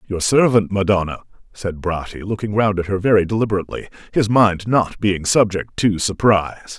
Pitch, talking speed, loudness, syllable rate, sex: 100 Hz, 160 wpm, -18 LUFS, 5.3 syllables/s, male